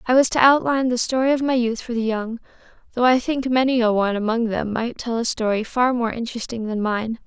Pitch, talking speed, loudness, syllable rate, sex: 235 Hz, 240 wpm, -20 LUFS, 6.0 syllables/s, female